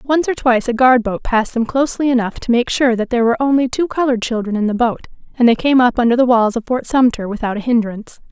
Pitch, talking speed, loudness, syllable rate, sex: 240 Hz, 260 wpm, -16 LUFS, 6.7 syllables/s, female